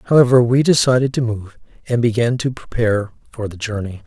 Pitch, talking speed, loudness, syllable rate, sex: 120 Hz, 175 wpm, -17 LUFS, 5.7 syllables/s, male